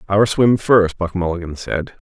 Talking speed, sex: 175 wpm, male